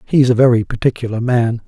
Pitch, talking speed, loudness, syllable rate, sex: 120 Hz, 180 wpm, -15 LUFS, 5.8 syllables/s, male